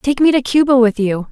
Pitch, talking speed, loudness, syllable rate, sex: 250 Hz, 275 wpm, -13 LUFS, 5.5 syllables/s, female